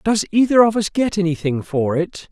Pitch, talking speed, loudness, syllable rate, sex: 185 Hz, 205 wpm, -18 LUFS, 5.1 syllables/s, male